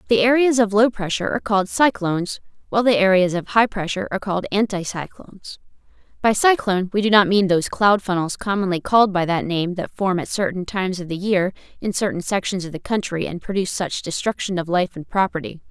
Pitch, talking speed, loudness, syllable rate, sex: 195 Hz, 205 wpm, -20 LUFS, 6.2 syllables/s, female